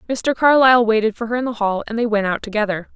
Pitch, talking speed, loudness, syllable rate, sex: 225 Hz, 265 wpm, -17 LUFS, 6.7 syllables/s, female